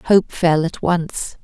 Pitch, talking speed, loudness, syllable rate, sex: 170 Hz, 165 wpm, -18 LUFS, 2.9 syllables/s, female